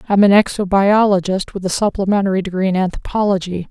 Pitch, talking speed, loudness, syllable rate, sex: 195 Hz, 145 wpm, -16 LUFS, 6.3 syllables/s, female